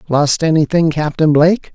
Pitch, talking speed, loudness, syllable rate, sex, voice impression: 155 Hz, 140 wpm, -13 LUFS, 5.1 syllables/s, male, very masculine, very adult-like, old, very thick, slightly relaxed, slightly weak, slightly dark, soft, slightly muffled, fluent, slightly raspy, very cool, very intellectual, sincere, very calm, very mature, friendly, reassuring, unique, wild, sweet, slightly kind